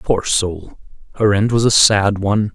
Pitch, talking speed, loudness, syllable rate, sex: 100 Hz, 190 wpm, -15 LUFS, 4.3 syllables/s, male